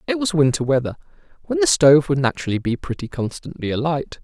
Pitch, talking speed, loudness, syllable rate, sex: 155 Hz, 185 wpm, -19 LUFS, 6.4 syllables/s, male